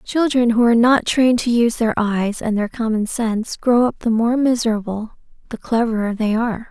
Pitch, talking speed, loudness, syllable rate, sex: 230 Hz, 195 wpm, -18 LUFS, 5.4 syllables/s, female